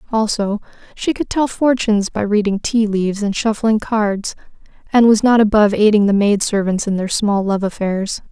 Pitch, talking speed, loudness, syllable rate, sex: 210 Hz, 180 wpm, -16 LUFS, 5.1 syllables/s, female